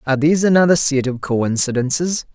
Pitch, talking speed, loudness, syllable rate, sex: 145 Hz, 155 wpm, -16 LUFS, 6.0 syllables/s, male